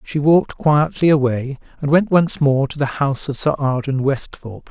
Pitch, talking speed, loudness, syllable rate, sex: 140 Hz, 190 wpm, -18 LUFS, 5.0 syllables/s, male